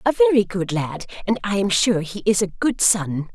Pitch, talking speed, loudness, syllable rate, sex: 195 Hz, 235 wpm, -20 LUFS, 5.0 syllables/s, female